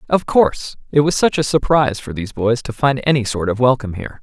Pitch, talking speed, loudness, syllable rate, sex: 130 Hz, 240 wpm, -17 LUFS, 6.4 syllables/s, male